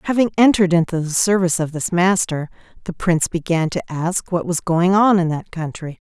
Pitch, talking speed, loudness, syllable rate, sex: 175 Hz, 200 wpm, -18 LUFS, 5.6 syllables/s, female